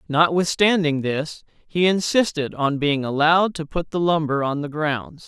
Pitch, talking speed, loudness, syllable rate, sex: 160 Hz, 160 wpm, -21 LUFS, 4.4 syllables/s, male